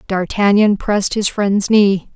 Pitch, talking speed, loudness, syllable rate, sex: 200 Hz, 140 wpm, -15 LUFS, 4.0 syllables/s, female